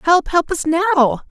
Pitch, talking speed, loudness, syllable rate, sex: 300 Hz, 185 wpm, -16 LUFS, 3.6 syllables/s, female